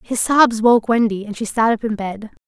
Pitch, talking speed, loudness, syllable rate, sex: 225 Hz, 245 wpm, -17 LUFS, 4.9 syllables/s, female